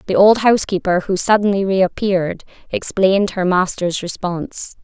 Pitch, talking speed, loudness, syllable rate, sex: 190 Hz, 125 wpm, -17 LUFS, 5.1 syllables/s, female